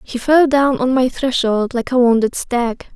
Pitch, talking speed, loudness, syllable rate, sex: 250 Hz, 205 wpm, -16 LUFS, 4.3 syllables/s, female